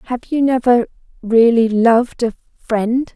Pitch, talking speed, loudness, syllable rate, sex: 235 Hz, 135 wpm, -15 LUFS, 4.2 syllables/s, female